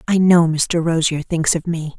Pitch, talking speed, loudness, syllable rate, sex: 165 Hz, 210 wpm, -17 LUFS, 4.4 syllables/s, female